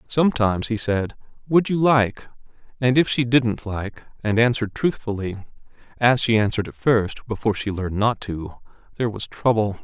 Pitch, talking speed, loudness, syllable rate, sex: 115 Hz, 165 wpm, -21 LUFS, 5.5 syllables/s, male